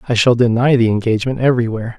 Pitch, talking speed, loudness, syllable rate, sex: 120 Hz, 180 wpm, -15 LUFS, 7.7 syllables/s, male